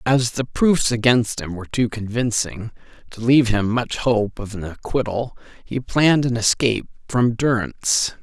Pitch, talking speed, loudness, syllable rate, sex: 115 Hz, 160 wpm, -20 LUFS, 4.7 syllables/s, male